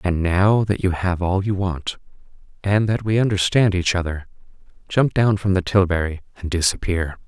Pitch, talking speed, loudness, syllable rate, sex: 95 Hz, 175 wpm, -20 LUFS, 4.9 syllables/s, male